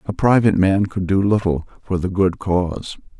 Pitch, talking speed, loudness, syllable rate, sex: 95 Hz, 190 wpm, -18 LUFS, 5.1 syllables/s, male